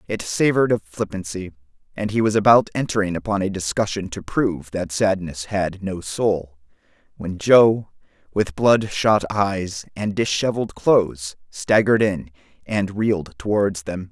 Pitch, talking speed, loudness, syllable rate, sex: 100 Hz, 145 wpm, -21 LUFS, 4.6 syllables/s, male